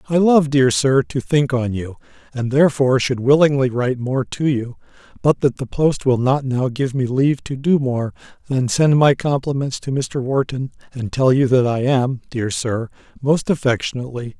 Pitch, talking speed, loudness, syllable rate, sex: 130 Hz, 190 wpm, -18 LUFS, 4.9 syllables/s, male